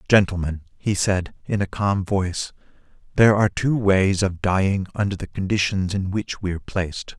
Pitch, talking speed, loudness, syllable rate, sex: 95 Hz, 165 wpm, -22 LUFS, 5.1 syllables/s, male